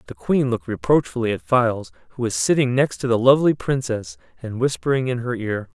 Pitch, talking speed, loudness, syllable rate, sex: 120 Hz, 195 wpm, -20 LUFS, 5.9 syllables/s, male